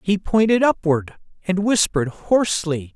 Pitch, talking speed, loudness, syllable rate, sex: 185 Hz, 120 wpm, -19 LUFS, 4.6 syllables/s, male